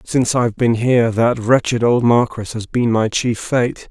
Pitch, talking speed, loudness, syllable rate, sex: 115 Hz, 200 wpm, -16 LUFS, 4.9 syllables/s, male